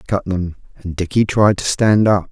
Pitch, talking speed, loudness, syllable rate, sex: 100 Hz, 235 wpm, -16 LUFS, 5.3 syllables/s, male